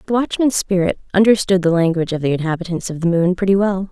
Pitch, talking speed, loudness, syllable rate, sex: 185 Hz, 215 wpm, -17 LUFS, 6.7 syllables/s, female